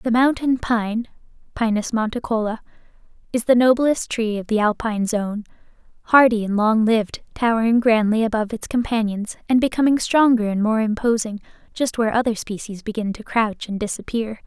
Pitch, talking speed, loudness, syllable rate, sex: 225 Hz, 150 wpm, -20 LUFS, 5.2 syllables/s, female